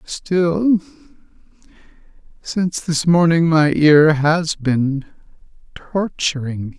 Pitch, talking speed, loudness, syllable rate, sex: 160 Hz, 90 wpm, -17 LUFS, 3.3 syllables/s, male